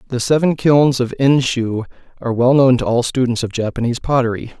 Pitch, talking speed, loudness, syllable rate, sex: 125 Hz, 185 wpm, -16 LUFS, 5.8 syllables/s, male